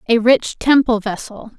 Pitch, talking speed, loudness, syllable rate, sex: 230 Hz, 150 wpm, -15 LUFS, 4.4 syllables/s, female